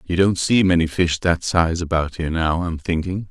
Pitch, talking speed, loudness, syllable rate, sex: 85 Hz, 220 wpm, -20 LUFS, 5.1 syllables/s, male